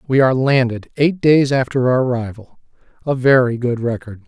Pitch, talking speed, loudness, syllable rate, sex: 130 Hz, 155 wpm, -16 LUFS, 5.4 syllables/s, male